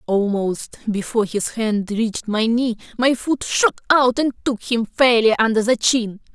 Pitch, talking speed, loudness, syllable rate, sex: 230 Hz, 170 wpm, -19 LUFS, 4.4 syllables/s, female